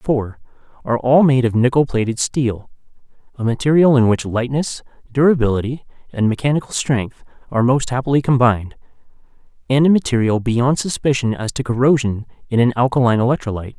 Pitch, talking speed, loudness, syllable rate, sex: 125 Hz, 140 wpm, -17 LUFS, 6.0 syllables/s, male